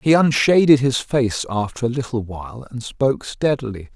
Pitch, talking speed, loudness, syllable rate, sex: 125 Hz, 165 wpm, -19 LUFS, 5.0 syllables/s, male